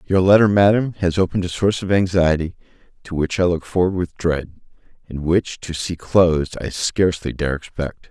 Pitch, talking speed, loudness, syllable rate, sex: 90 Hz, 185 wpm, -19 LUFS, 5.3 syllables/s, male